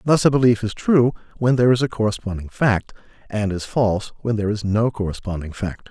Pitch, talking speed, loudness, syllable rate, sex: 110 Hz, 205 wpm, -20 LUFS, 5.9 syllables/s, male